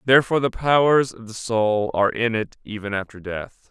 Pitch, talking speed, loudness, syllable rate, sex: 115 Hz, 195 wpm, -21 LUFS, 5.4 syllables/s, male